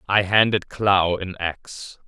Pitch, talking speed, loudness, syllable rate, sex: 95 Hz, 145 wpm, -20 LUFS, 3.3 syllables/s, male